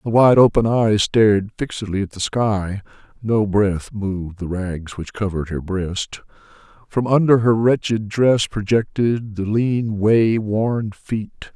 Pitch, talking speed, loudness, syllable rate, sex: 105 Hz, 150 wpm, -19 LUFS, 4.0 syllables/s, male